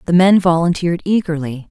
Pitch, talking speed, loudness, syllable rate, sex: 170 Hz, 140 wpm, -15 LUFS, 5.9 syllables/s, female